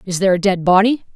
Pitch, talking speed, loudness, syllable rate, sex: 195 Hz, 260 wpm, -15 LUFS, 7.2 syllables/s, female